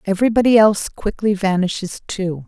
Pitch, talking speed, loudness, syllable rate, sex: 200 Hz, 120 wpm, -17 LUFS, 5.6 syllables/s, female